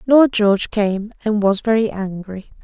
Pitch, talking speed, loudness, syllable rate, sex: 210 Hz, 160 wpm, -17 LUFS, 4.4 syllables/s, female